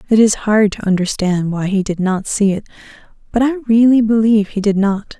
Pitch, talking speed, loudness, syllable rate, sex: 210 Hz, 210 wpm, -15 LUFS, 5.3 syllables/s, female